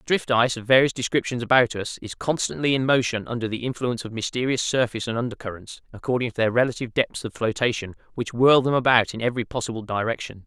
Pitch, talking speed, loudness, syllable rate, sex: 120 Hz, 205 wpm, -23 LUFS, 5.6 syllables/s, male